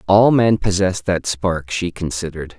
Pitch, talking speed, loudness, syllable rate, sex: 90 Hz, 165 wpm, -18 LUFS, 4.9 syllables/s, male